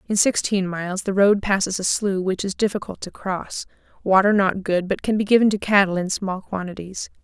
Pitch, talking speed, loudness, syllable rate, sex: 195 Hz, 205 wpm, -21 LUFS, 5.3 syllables/s, female